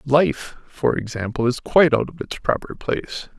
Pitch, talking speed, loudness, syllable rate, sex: 135 Hz, 175 wpm, -21 LUFS, 4.8 syllables/s, male